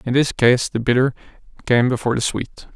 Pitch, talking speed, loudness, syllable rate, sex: 125 Hz, 195 wpm, -19 LUFS, 5.6 syllables/s, male